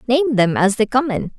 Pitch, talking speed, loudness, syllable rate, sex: 240 Hz, 260 wpm, -17 LUFS, 5.0 syllables/s, female